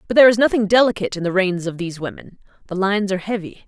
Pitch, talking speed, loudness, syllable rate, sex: 200 Hz, 245 wpm, -18 LUFS, 7.8 syllables/s, female